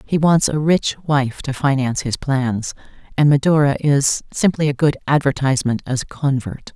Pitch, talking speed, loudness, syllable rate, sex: 140 Hz, 170 wpm, -18 LUFS, 4.9 syllables/s, female